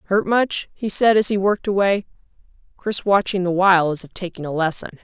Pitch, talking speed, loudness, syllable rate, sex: 190 Hz, 205 wpm, -19 LUFS, 5.7 syllables/s, female